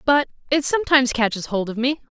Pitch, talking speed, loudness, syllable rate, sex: 260 Hz, 195 wpm, -20 LUFS, 6.4 syllables/s, female